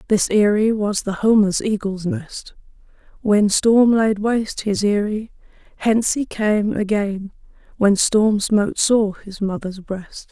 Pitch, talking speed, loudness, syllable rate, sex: 210 Hz, 140 wpm, -19 LUFS, 4.0 syllables/s, female